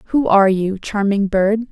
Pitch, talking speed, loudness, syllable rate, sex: 205 Hz, 175 wpm, -16 LUFS, 4.2 syllables/s, female